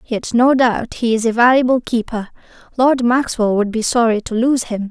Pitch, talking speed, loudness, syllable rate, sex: 235 Hz, 195 wpm, -16 LUFS, 4.8 syllables/s, female